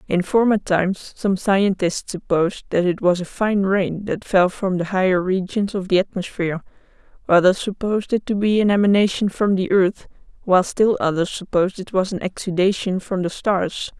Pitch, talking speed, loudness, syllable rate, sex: 190 Hz, 180 wpm, -20 LUFS, 5.2 syllables/s, female